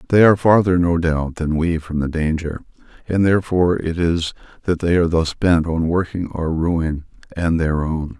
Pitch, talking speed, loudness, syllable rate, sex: 85 Hz, 190 wpm, -18 LUFS, 4.9 syllables/s, male